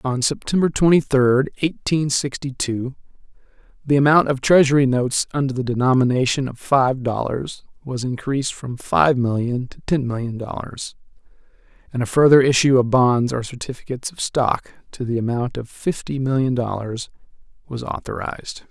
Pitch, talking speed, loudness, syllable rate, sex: 130 Hz, 150 wpm, -20 LUFS, 5.0 syllables/s, male